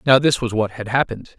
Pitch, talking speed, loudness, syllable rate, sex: 120 Hz, 260 wpm, -19 LUFS, 6.4 syllables/s, male